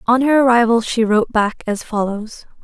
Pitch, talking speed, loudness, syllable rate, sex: 230 Hz, 180 wpm, -16 LUFS, 5.2 syllables/s, female